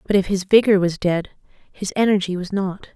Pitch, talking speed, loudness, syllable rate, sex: 190 Hz, 205 wpm, -19 LUFS, 5.5 syllables/s, female